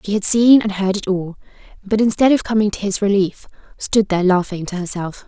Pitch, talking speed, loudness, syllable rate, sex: 200 Hz, 215 wpm, -17 LUFS, 5.7 syllables/s, female